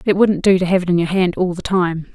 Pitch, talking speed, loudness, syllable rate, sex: 180 Hz, 335 wpm, -17 LUFS, 6.1 syllables/s, female